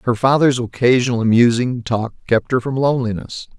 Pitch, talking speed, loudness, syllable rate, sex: 120 Hz, 150 wpm, -17 LUFS, 5.3 syllables/s, male